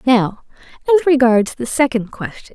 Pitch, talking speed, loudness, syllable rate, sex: 255 Hz, 140 wpm, -16 LUFS, 4.7 syllables/s, female